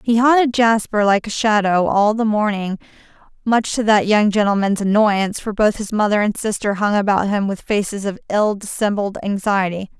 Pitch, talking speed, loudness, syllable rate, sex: 210 Hz, 180 wpm, -17 LUFS, 5.1 syllables/s, female